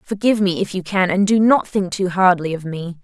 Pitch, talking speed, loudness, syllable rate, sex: 190 Hz, 255 wpm, -18 LUFS, 5.5 syllables/s, female